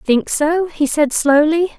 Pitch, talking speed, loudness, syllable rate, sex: 305 Hz, 170 wpm, -15 LUFS, 3.7 syllables/s, female